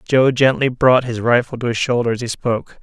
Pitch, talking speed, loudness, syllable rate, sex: 125 Hz, 235 wpm, -17 LUFS, 5.7 syllables/s, male